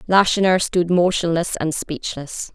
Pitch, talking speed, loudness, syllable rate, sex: 175 Hz, 120 wpm, -19 LUFS, 4.2 syllables/s, female